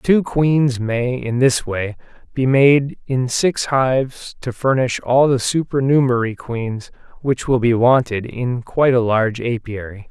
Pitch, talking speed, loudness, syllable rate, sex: 125 Hz, 155 wpm, -18 LUFS, 4.1 syllables/s, male